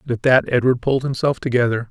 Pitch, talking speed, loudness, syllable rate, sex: 125 Hz, 220 wpm, -18 LUFS, 6.7 syllables/s, male